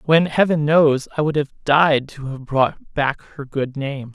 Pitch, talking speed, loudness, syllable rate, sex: 145 Hz, 205 wpm, -19 LUFS, 3.8 syllables/s, male